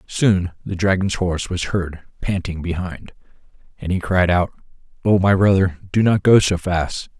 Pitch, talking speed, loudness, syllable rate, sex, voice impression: 90 Hz, 165 wpm, -19 LUFS, 4.6 syllables/s, male, masculine, middle-aged, powerful, slightly hard, muffled, raspy, calm, mature, wild, slightly lively, slightly strict, slightly modest